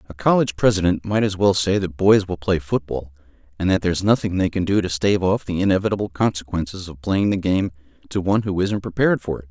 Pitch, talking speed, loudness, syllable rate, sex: 95 Hz, 225 wpm, -20 LUFS, 6.4 syllables/s, male